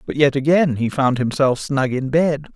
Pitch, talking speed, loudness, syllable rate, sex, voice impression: 140 Hz, 210 wpm, -18 LUFS, 4.7 syllables/s, male, masculine, adult-like, thick, tensed, powerful, slightly muffled, slightly raspy, intellectual, friendly, unique, wild, lively